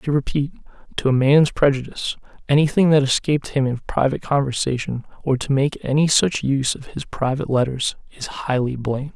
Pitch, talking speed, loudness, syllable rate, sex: 135 Hz, 170 wpm, -20 LUFS, 5.7 syllables/s, male